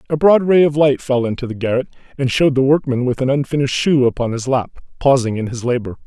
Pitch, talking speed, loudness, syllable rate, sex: 135 Hz, 240 wpm, -16 LUFS, 6.4 syllables/s, male